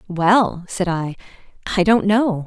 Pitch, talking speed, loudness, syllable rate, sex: 190 Hz, 145 wpm, -18 LUFS, 3.6 syllables/s, female